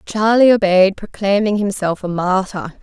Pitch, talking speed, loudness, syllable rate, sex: 195 Hz, 130 wpm, -15 LUFS, 4.5 syllables/s, female